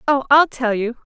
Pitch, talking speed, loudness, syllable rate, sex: 255 Hz, 215 wpm, -17 LUFS, 4.7 syllables/s, female